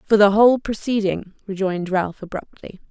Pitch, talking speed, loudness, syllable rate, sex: 200 Hz, 145 wpm, -19 LUFS, 5.4 syllables/s, female